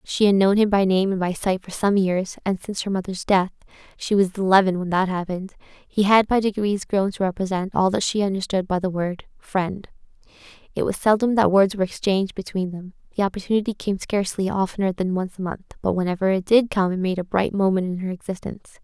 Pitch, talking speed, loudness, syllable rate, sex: 195 Hz, 220 wpm, -22 LUFS, 5.5 syllables/s, female